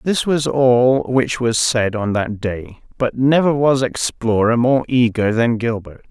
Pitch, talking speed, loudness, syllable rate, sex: 120 Hz, 165 wpm, -17 LUFS, 3.9 syllables/s, male